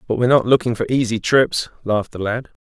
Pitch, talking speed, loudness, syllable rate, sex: 120 Hz, 250 wpm, -18 LUFS, 6.8 syllables/s, male